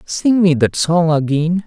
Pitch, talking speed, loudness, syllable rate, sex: 165 Hz, 180 wpm, -15 LUFS, 3.8 syllables/s, male